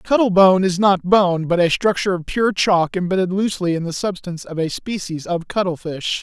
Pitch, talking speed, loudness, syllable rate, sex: 185 Hz, 200 wpm, -18 LUFS, 5.3 syllables/s, male